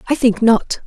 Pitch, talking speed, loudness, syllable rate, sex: 230 Hz, 205 wpm, -15 LUFS, 4.8 syllables/s, female